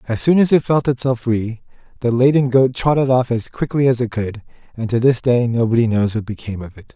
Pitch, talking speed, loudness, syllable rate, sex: 120 Hz, 235 wpm, -17 LUFS, 5.7 syllables/s, male